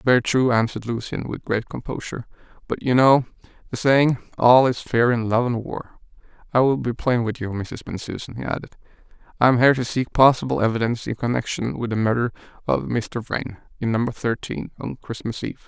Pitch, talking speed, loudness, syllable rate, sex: 120 Hz, 190 wpm, -22 LUFS, 5.8 syllables/s, male